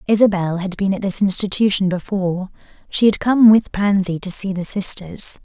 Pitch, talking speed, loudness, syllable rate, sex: 195 Hz, 175 wpm, -17 LUFS, 5.1 syllables/s, female